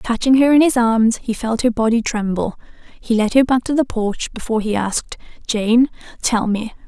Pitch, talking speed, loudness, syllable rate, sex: 230 Hz, 200 wpm, -17 LUFS, 5.0 syllables/s, female